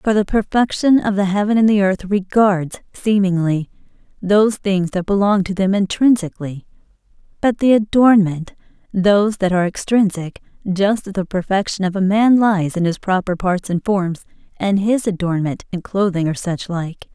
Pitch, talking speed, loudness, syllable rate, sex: 195 Hz, 165 wpm, -17 LUFS, 4.9 syllables/s, female